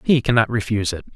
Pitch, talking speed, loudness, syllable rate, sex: 110 Hz, 260 wpm, -19 LUFS, 7.4 syllables/s, male